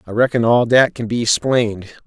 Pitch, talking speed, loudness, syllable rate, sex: 115 Hz, 205 wpm, -16 LUFS, 5.1 syllables/s, male